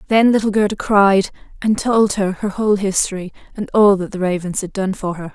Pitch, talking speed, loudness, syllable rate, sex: 200 Hz, 215 wpm, -17 LUFS, 5.4 syllables/s, female